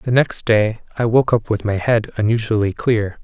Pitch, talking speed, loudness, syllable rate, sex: 110 Hz, 205 wpm, -18 LUFS, 4.7 syllables/s, male